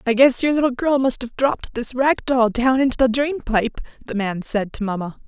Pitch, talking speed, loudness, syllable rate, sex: 245 Hz, 240 wpm, -20 LUFS, 5.2 syllables/s, female